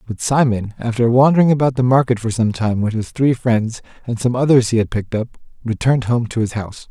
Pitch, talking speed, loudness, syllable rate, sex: 120 Hz, 225 wpm, -17 LUFS, 6.0 syllables/s, male